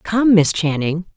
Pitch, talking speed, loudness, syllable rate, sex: 180 Hz, 155 wpm, -16 LUFS, 3.8 syllables/s, female